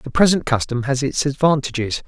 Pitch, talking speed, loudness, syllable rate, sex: 140 Hz, 175 wpm, -19 LUFS, 5.5 syllables/s, male